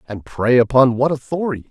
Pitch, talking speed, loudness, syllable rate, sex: 130 Hz, 175 wpm, -16 LUFS, 5.8 syllables/s, male